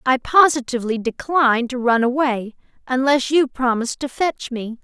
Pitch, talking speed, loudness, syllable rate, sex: 255 Hz, 150 wpm, -19 LUFS, 5.0 syllables/s, female